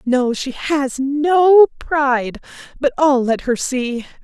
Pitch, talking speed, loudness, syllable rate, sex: 270 Hz, 140 wpm, -16 LUFS, 3.2 syllables/s, female